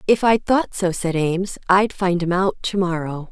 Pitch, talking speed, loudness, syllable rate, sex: 185 Hz, 215 wpm, -20 LUFS, 4.8 syllables/s, female